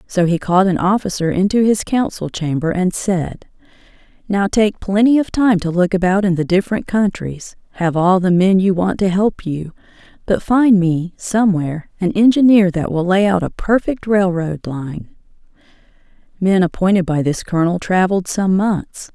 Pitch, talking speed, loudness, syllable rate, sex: 190 Hz, 170 wpm, -16 LUFS, 4.9 syllables/s, female